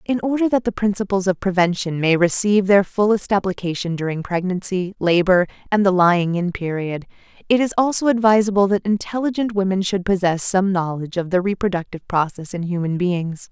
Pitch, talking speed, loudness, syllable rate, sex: 190 Hz, 170 wpm, -19 LUFS, 5.7 syllables/s, female